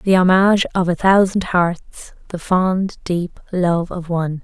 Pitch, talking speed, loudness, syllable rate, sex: 180 Hz, 160 wpm, -17 LUFS, 4.0 syllables/s, female